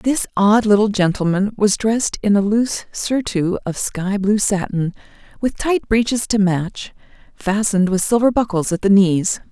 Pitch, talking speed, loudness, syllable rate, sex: 205 Hz, 165 wpm, -18 LUFS, 4.6 syllables/s, female